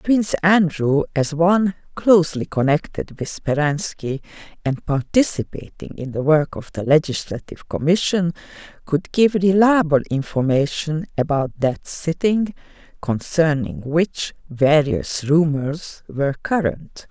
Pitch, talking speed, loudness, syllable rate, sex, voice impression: 160 Hz, 105 wpm, -20 LUFS, 4.2 syllables/s, female, feminine, very adult-like, slightly soft, slightly intellectual, calm, elegant